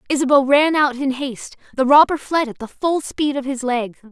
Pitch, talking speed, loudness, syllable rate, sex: 270 Hz, 220 wpm, -18 LUFS, 5.3 syllables/s, female